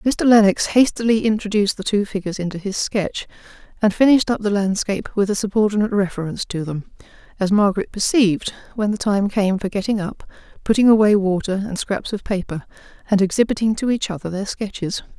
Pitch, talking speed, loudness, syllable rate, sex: 205 Hz, 175 wpm, -19 LUFS, 6.1 syllables/s, female